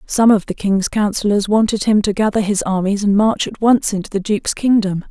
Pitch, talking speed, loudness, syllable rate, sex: 205 Hz, 225 wpm, -16 LUFS, 5.4 syllables/s, female